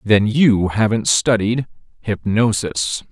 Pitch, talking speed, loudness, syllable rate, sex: 105 Hz, 95 wpm, -17 LUFS, 3.4 syllables/s, male